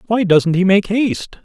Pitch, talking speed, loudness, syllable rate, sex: 200 Hz, 210 wpm, -15 LUFS, 4.7 syllables/s, male